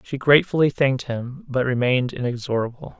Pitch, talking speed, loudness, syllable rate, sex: 130 Hz, 140 wpm, -21 LUFS, 5.9 syllables/s, male